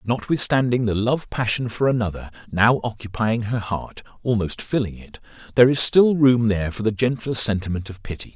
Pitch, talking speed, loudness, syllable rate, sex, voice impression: 115 Hz, 160 wpm, -21 LUFS, 5.4 syllables/s, male, very masculine, slightly old, very thick, tensed, slightly powerful, slightly bright, soft, slightly muffled, fluent, raspy, cool, intellectual, slightly refreshing, sincere, calm, very mature, very friendly, reassuring, very unique, elegant, very wild, sweet, lively, kind, slightly intense